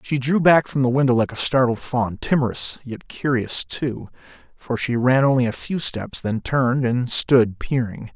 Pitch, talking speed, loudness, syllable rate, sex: 125 Hz, 190 wpm, -20 LUFS, 4.5 syllables/s, male